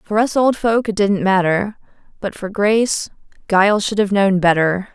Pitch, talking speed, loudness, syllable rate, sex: 205 Hz, 170 wpm, -16 LUFS, 4.7 syllables/s, female